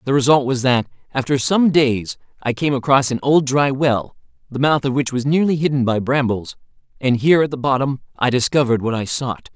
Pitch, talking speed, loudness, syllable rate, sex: 130 Hz, 205 wpm, -18 LUFS, 5.5 syllables/s, male